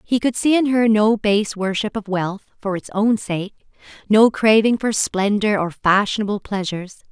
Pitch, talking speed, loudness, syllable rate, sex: 210 Hz, 175 wpm, -18 LUFS, 4.7 syllables/s, female